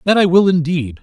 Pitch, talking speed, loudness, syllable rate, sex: 170 Hz, 235 wpm, -14 LUFS, 5.6 syllables/s, male